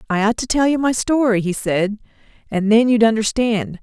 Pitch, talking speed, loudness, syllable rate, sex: 225 Hz, 205 wpm, -17 LUFS, 5.1 syllables/s, female